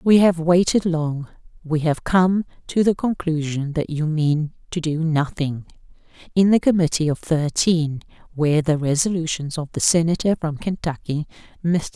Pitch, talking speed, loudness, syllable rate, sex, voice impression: 160 Hz, 150 wpm, -21 LUFS, 4.6 syllables/s, female, feminine, adult-like, slightly clear, slightly elegant